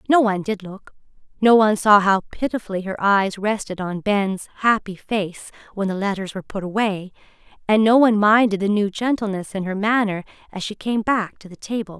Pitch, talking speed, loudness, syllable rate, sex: 205 Hz, 195 wpm, -20 LUFS, 5.6 syllables/s, female